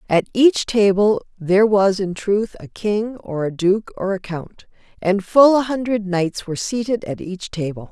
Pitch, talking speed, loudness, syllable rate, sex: 200 Hz, 190 wpm, -19 LUFS, 4.4 syllables/s, female